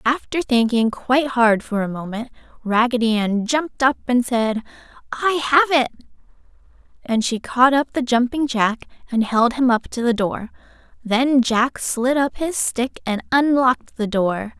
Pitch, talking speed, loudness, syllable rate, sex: 245 Hz, 165 wpm, -19 LUFS, 4.4 syllables/s, female